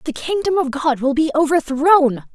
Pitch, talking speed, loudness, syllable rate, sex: 295 Hz, 180 wpm, -17 LUFS, 4.8 syllables/s, female